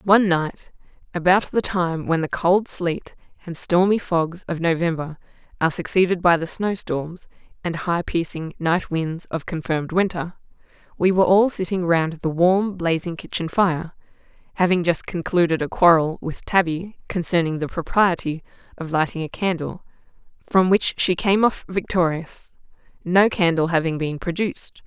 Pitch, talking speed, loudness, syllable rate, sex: 175 Hz, 150 wpm, -21 LUFS, 4.7 syllables/s, female